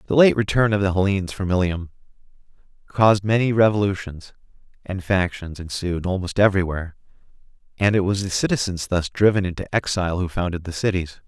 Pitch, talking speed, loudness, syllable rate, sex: 95 Hz, 155 wpm, -21 LUFS, 6.1 syllables/s, male